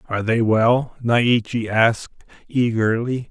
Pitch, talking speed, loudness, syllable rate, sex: 115 Hz, 110 wpm, -19 LUFS, 3.9 syllables/s, male